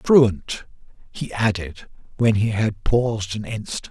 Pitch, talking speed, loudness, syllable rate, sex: 110 Hz, 140 wpm, -22 LUFS, 3.8 syllables/s, male